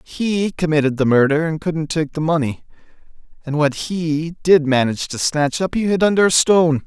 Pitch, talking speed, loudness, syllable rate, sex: 160 Hz, 190 wpm, -17 LUFS, 5.1 syllables/s, male